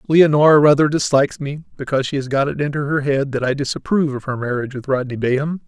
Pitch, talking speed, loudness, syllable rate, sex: 140 Hz, 220 wpm, -18 LUFS, 6.7 syllables/s, male